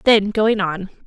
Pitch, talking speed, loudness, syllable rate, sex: 200 Hz, 170 wpm, -18 LUFS, 3.7 syllables/s, female